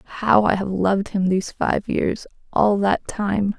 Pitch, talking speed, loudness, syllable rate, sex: 200 Hz, 185 wpm, -21 LUFS, 4.5 syllables/s, female